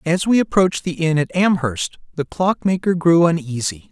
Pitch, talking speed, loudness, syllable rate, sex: 165 Hz, 170 wpm, -18 LUFS, 5.0 syllables/s, male